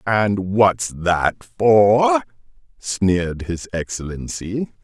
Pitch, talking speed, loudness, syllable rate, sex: 105 Hz, 85 wpm, -19 LUFS, 2.9 syllables/s, male